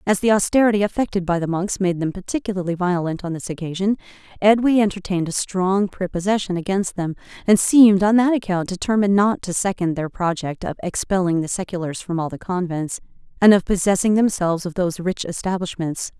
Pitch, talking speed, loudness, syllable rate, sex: 190 Hz, 180 wpm, -20 LUFS, 5.9 syllables/s, female